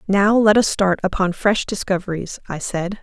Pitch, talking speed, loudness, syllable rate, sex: 195 Hz, 180 wpm, -19 LUFS, 4.8 syllables/s, female